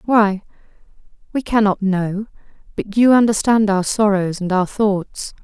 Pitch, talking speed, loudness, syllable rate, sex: 205 Hz, 120 wpm, -17 LUFS, 4.2 syllables/s, female